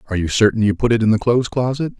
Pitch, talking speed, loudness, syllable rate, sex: 115 Hz, 300 wpm, -17 LUFS, 8.0 syllables/s, male